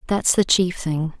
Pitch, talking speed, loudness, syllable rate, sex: 175 Hz, 200 wpm, -19 LUFS, 4.1 syllables/s, female